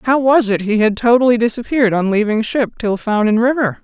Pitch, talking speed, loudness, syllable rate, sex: 230 Hz, 220 wpm, -15 LUFS, 5.8 syllables/s, female